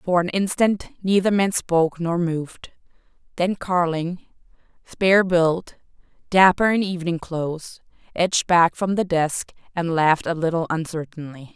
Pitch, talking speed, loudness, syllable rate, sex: 175 Hz, 135 wpm, -21 LUFS, 4.6 syllables/s, female